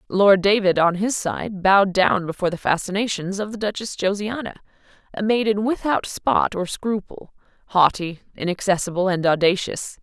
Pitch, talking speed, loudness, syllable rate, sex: 195 Hz, 140 wpm, -21 LUFS, 5.1 syllables/s, female